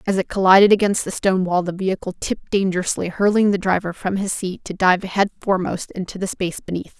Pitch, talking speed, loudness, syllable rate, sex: 190 Hz, 205 wpm, -19 LUFS, 6.2 syllables/s, female